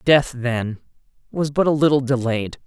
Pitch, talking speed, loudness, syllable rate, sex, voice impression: 130 Hz, 160 wpm, -20 LUFS, 4.5 syllables/s, female, very feminine, very adult-like, middle-aged, slightly thin, very tensed, very powerful, bright, very hard, very clear, very fluent, raspy, very cool, very intellectual, refreshing, sincere, slightly calm, slightly friendly, slightly reassuring, very unique, elegant, slightly wild, slightly sweet, very lively, very strict, very intense, very sharp